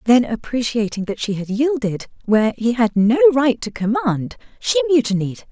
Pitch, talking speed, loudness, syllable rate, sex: 240 Hz, 165 wpm, -18 LUFS, 4.9 syllables/s, female